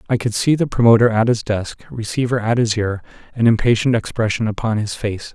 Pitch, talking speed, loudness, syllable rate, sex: 115 Hz, 200 wpm, -18 LUFS, 5.7 syllables/s, male